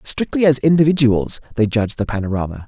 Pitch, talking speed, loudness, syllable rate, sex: 130 Hz, 155 wpm, -17 LUFS, 6.2 syllables/s, male